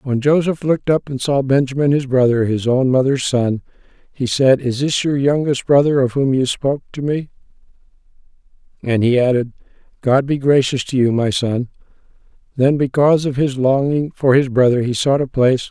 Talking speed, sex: 200 wpm, male